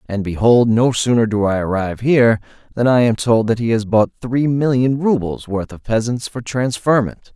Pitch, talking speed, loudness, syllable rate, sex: 115 Hz, 195 wpm, -17 LUFS, 5.0 syllables/s, male